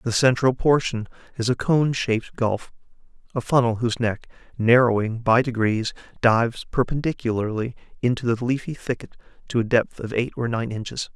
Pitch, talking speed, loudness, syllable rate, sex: 120 Hz, 155 wpm, -23 LUFS, 5.3 syllables/s, male